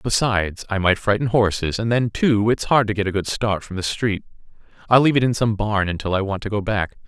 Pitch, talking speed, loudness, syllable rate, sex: 105 Hz, 255 wpm, -20 LUFS, 5.8 syllables/s, male